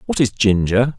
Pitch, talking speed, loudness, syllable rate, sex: 115 Hz, 180 wpm, -17 LUFS, 4.7 syllables/s, male